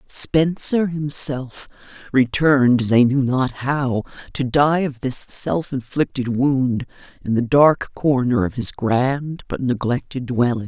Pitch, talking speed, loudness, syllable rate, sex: 130 Hz, 135 wpm, -19 LUFS, 3.6 syllables/s, female